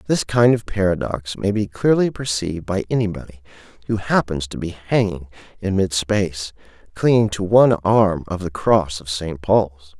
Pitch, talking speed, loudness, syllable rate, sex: 95 Hz, 170 wpm, -19 LUFS, 4.9 syllables/s, male